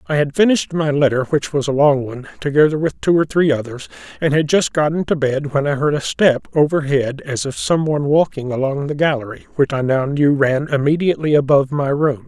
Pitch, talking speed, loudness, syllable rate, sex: 145 Hz, 215 wpm, -17 LUFS, 5.7 syllables/s, male